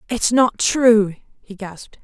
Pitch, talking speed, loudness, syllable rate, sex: 220 Hz, 150 wpm, -16 LUFS, 3.8 syllables/s, female